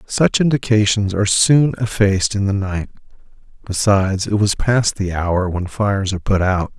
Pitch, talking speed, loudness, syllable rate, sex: 100 Hz, 170 wpm, -17 LUFS, 5.0 syllables/s, male